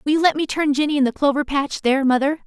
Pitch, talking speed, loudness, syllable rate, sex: 285 Hz, 290 wpm, -19 LUFS, 6.9 syllables/s, female